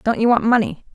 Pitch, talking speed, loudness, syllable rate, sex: 225 Hz, 255 wpm, -17 LUFS, 6.4 syllables/s, female